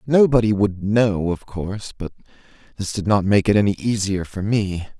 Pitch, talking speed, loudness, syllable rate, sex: 100 Hz, 180 wpm, -20 LUFS, 4.9 syllables/s, male